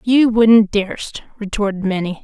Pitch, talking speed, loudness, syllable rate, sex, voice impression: 210 Hz, 135 wpm, -15 LUFS, 4.0 syllables/s, female, very feminine, adult-like, slightly middle-aged, thin, tensed, slightly powerful, slightly bright, hard, slightly muffled, fluent, slightly cute, intellectual, slightly refreshing, sincere, slightly calm, slightly friendly, slightly reassuring, very unique, slightly elegant, wild, slightly sweet, slightly lively, strict, slightly intense, sharp